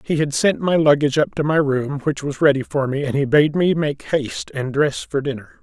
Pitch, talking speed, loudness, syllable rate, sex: 145 Hz, 255 wpm, -19 LUFS, 5.4 syllables/s, male